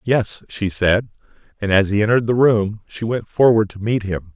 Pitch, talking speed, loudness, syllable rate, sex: 105 Hz, 205 wpm, -18 LUFS, 5.0 syllables/s, male